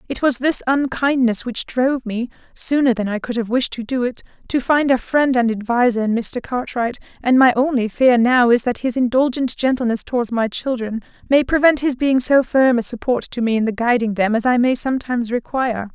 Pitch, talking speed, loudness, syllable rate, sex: 245 Hz, 215 wpm, -18 LUFS, 5.4 syllables/s, female